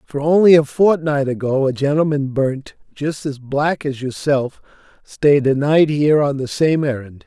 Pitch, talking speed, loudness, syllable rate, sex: 145 Hz, 175 wpm, -17 LUFS, 4.4 syllables/s, male